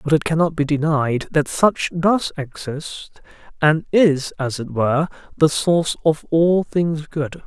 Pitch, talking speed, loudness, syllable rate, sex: 155 Hz, 160 wpm, -19 LUFS, 3.9 syllables/s, male